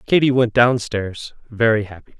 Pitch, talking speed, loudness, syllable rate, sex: 115 Hz, 165 wpm, -18 LUFS, 4.6 syllables/s, male